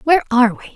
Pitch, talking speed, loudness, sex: 270 Hz, 240 wpm, -15 LUFS, female